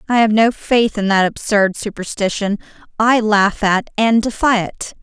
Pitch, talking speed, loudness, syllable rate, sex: 215 Hz, 155 wpm, -16 LUFS, 4.4 syllables/s, female